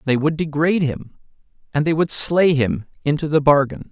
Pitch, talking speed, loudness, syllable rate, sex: 150 Hz, 185 wpm, -18 LUFS, 5.2 syllables/s, male